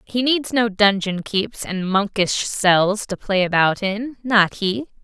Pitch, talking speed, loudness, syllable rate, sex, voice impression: 205 Hz, 155 wpm, -19 LUFS, 3.6 syllables/s, female, feminine, adult-like, slightly intellectual, sincere, slightly friendly